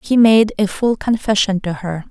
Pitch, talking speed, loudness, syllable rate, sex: 205 Hz, 200 wpm, -16 LUFS, 4.7 syllables/s, female